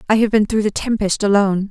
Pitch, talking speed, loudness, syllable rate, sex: 210 Hz, 245 wpm, -17 LUFS, 6.5 syllables/s, female